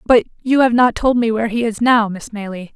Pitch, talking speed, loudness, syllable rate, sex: 230 Hz, 260 wpm, -16 LUFS, 5.7 syllables/s, female